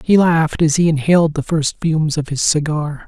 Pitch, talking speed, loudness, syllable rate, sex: 155 Hz, 215 wpm, -16 LUFS, 5.4 syllables/s, male